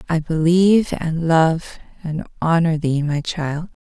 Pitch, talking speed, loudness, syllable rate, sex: 160 Hz, 140 wpm, -19 LUFS, 3.8 syllables/s, female